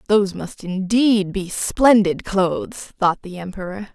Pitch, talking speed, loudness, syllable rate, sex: 195 Hz, 135 wpm, -19 LUFS, 4.1 syllables/s, female